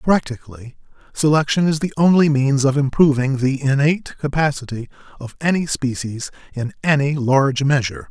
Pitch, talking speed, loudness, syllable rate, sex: 140 Hz, 135 wpm, -18 LUFS, 5.3 syllables/s, male